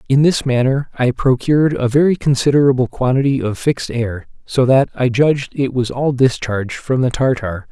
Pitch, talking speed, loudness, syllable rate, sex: 130 Hz, 180 wpm, -16 LUFS, 5.3 syllables/s, male